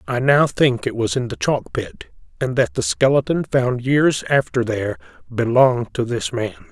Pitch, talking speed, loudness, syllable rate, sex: 125 Hz, 190 wpm, -19 LUFS, 4.7 syllables/s, male